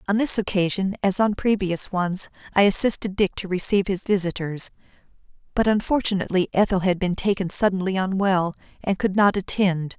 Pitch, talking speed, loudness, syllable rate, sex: 190 Hz, 155 wpm, -22 LUFS, 5.5 syllables/s, female